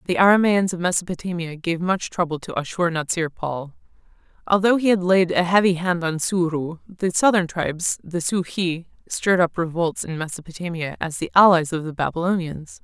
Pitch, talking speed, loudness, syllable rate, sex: 175 Hz, 170 wpm, -21 LUFS, 5.3 syllables/s, female